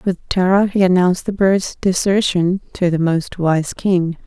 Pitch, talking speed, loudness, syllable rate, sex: 185 Hz, 170 wpm, -17 LUFS, 4.3 syllables/s, female